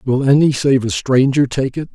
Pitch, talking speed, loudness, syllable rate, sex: 130 Hz, 215 wpm, -15 LUFS, 4.8 syllables/s, male